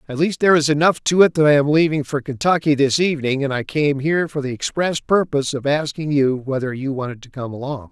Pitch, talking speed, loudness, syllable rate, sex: 145 Hz, 245 wpm, -18 LUFS, 6.1 syllables/s, male